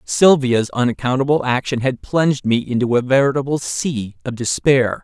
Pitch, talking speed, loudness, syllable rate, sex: 130 Hz, 145 wpm, -17 LUFS, 4.9 syllables/s, male